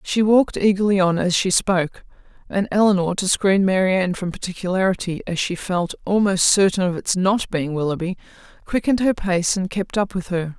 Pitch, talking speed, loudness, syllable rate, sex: 185 Hz, 180 wpm, -20 LUFS, 5.5 syllables/s, female